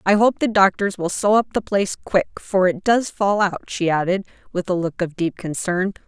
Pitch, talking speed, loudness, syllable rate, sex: 190 Hz, 225 wpm, -20 LUFS, 5.2 syllables/s, female